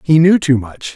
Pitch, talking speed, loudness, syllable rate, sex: 150 Hz, 250 wpm, -13 LUFS, 4.7 syllables/s, male